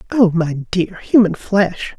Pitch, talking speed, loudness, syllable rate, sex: 185 Hz, 150 wpm, -16 LUFS, 3.8 syllables/s, female